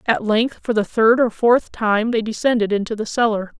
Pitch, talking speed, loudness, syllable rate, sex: 220 Hz, 215 wpm, -18 LUFS, 5.0 syllables/s, female